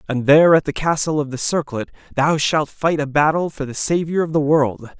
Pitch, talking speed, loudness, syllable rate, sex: 150 Hz, 230 wpm, -18 LUFS, 5.4 syllables/s, male